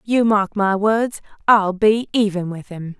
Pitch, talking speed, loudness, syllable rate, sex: 205 Hz, 180 wpm, -18 LUFS, 3.9 syllables/s, female